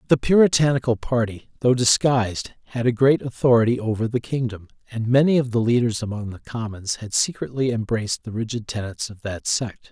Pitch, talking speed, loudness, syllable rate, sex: 120 Hz, 175 wpm, -22 LUFS, 5.6 syllables/s, male